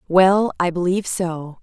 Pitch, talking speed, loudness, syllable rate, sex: 180 Hz, 150 wpm, -19 LUFS, 4.3 syllables/s, female